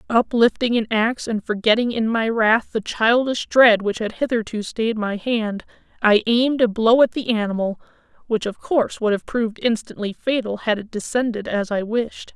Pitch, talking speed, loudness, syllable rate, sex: 225 Hz, 185 wpm, -20 LUFS, 4.9 syllables/s, female